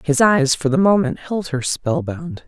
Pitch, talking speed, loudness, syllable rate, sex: 195 Hz, 195 wpm, -18 LUFS, 4.2 syllables/s, female